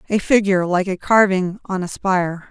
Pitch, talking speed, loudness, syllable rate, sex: 190 Hz, 190 wpm, -18 LUFS, 5.2 syllables/s, female